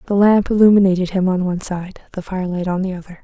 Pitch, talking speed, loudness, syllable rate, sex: 185 Hz, 220 wpm, -17 LUFS, 6.7 syllables/s, female